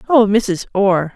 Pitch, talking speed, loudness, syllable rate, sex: 205 Hz, 155 wpm, -15 LUFS, 3.3 syllables/s, female